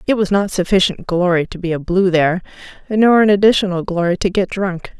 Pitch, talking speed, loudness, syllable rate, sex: 185 Hz, 205 wpm, -16 LUFS, 5.7 syllables/s, female